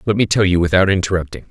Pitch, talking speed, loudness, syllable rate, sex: 95 Hz, 240 wpm, -16 LUFS, 7.4 syllables/s, male